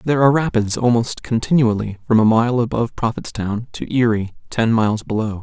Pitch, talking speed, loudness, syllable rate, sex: 115 Hz, 165 wpm, -18 LUFS, 5.7 syllables/s, male